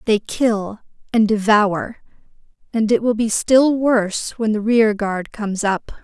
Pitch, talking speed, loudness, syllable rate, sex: 220 Hz, 150 wpm, -18 LUFS, 3.9 syllables/s, female